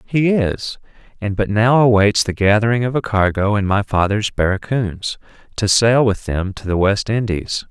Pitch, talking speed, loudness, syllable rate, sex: 105 Hz, 180 wpm, -17 LUFS, 4.6 syllables/s, male